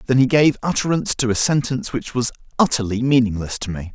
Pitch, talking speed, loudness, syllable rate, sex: 125 Hz, 200 wpm, -19 LUFS, 6.4 syllables/s, male